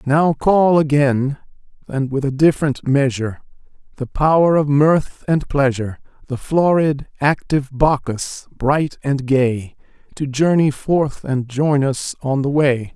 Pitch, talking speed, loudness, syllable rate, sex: 140 Hz, 140 wpm, -17 LUFS, 4.0 syllables/s, male